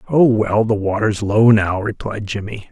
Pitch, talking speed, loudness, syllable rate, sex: 105 Hz, 175 wpm, -17 LUFS, 4.4 syllables/s, male